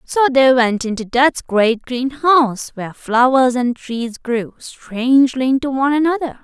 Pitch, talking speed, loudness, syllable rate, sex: 255 Hz, 150 wpm, -16 LUFS, 4.4 syllables/s, female